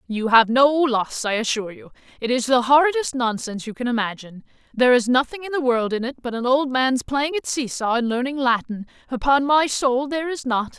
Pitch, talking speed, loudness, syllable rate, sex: 250 Hz, 225 wpm, -20 LUFS, 5.6 syllables/s, female